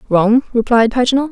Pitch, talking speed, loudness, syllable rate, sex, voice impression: 240 Hz, 135 wpm, -14 LUFS, 5.5 syllables/s, female, very feminine, young, slightly adult-like, very thin, slightly relaxed, weak, slightly dark, soft, very clear, very fluent, very cute, intellectual, refreshing, sincere, very calm, very friendly, very reassuring, unique, elegant, very sweet, slightly lively, very kind, slightly intense, slightly sharp, modest, light